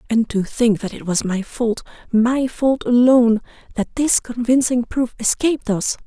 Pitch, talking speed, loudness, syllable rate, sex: 235 Hz, 170 wpm, -18 LUFS, 4.6 syllables/s, female